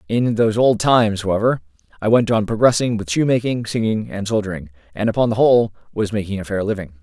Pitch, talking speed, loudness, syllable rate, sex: 105 Hz, 195 wpm, -18 LUFS, 6.4 syllables/s, male